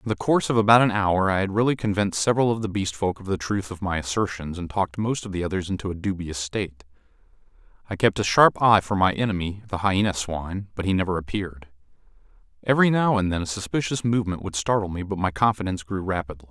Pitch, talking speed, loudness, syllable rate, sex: 100 Hz, 225 wpm, -23 LUFS, 6.6 syllables/s, male